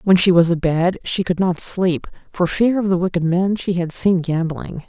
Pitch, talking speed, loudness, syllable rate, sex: 175 Hz, 220 wpm, -18 LUFS, 4.6 syllables/s, female